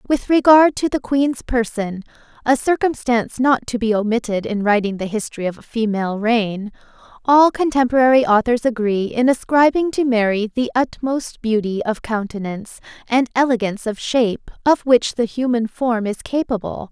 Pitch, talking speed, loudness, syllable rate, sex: 235 Hz, 155 wpm, -18 LUFS, 5.1 syllables/s, female